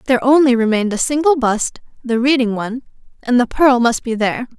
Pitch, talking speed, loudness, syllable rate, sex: 245 Hz, 170 wpm, -15 LUFS, 6.2 syllables/s, female